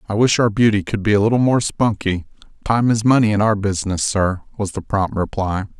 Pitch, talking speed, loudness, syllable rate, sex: 105 Hz, 215 wpm, -18 LUFS, 5.6 syllables/s, male